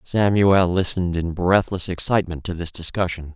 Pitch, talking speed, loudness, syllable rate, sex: 90 Hz, 145 wpm, -21 LUFS, 5.2 syllables/s, male